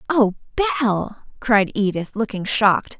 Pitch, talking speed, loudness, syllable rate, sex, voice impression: 220 Hz, 120 wpm, -20 LUFS, 5.6 syllables/s, female, very feminine, adult-like, slightly middle-aged, thin, tensed, slightly powerful, bright, hard, clear, fluent, slightly cool, intellectual, refreshing, very sincere, calm, very friendly, reassuring, slightly unique, elegant, slightly wild, slightly sweet, lively, slightly strict, slightly intense, slightly sharp